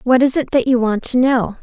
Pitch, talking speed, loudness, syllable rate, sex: 250 Hz, 295 wpm, -16 LUFS, 5.5 syllables/s, female